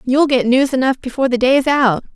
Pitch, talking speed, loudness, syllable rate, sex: 255 Hz, 225 wpm, -15 LUFS, 5.6 syllables/s, female